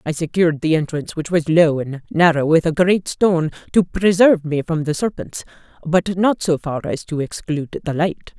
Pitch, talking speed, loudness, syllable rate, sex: 165 Hz, 200 wpm, -18 LUFS, 5.3 syllables/s, female